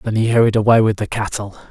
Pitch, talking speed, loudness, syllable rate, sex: 110 Hz, 245 wpm, -16 LUFS, 6.7 syllables/s, male